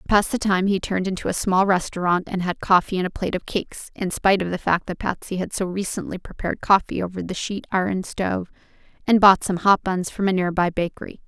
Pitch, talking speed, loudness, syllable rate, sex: 185 Hz, 240 wpm, -22 LUFS, 6.1 syllables/s, female